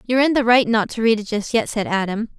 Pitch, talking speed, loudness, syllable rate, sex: 225 Hz, 300 wpm, -19 LUFS, 6.5 syllables/s, female